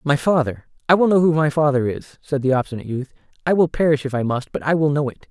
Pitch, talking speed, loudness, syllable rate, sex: 145 Hz, 260 wpm, -19 LUFS, 6.5 syllables/s, male